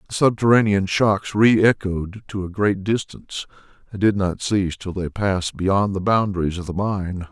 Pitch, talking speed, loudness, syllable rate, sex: 100 Hz, 180 wpm, -20 LUFS, 4.8 syllables/s, male